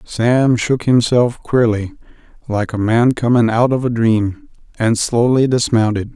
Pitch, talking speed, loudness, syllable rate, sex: 115 Hz, 145 wpm, -15 LUFS, 4.0 syllables/s, male